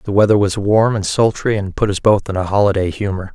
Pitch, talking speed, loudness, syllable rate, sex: 100 Hz, 250 wpm, -16 LUFS, 5.9 syllables/s, male